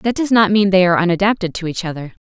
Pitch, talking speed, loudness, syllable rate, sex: 190 Hz, 270 wpm, -15 LUFS, 7.0 syllables/s, female